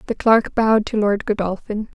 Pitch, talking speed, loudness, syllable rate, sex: 215 Hz, 180 wpm, -19 LUFS, 5.1 syllables/s, female